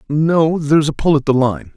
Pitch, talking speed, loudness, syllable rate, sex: 150 Hz, 240 wpm, -15 LUFS, 5.2 syllables/s, male